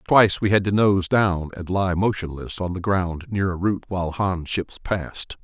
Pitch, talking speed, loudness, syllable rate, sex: 95 Hz, 210 wpm, -22 LUFS, 5.0 syllables/s, male